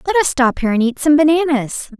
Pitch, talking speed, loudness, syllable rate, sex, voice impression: 280 Hz, 240 wpm, -15 LUFS, 6.0 syllables/s, female, very feminine, very young, very thin, very tensed, powerful, bright, soft, very clear, fluent, slightly raspy, very cute, slightly intellectual, very refreshing, sincere, slightly calm, friendly, reassuring, very unique, very elegant, wild, sweet, very lively, slightly kind, intense, very sharp, very light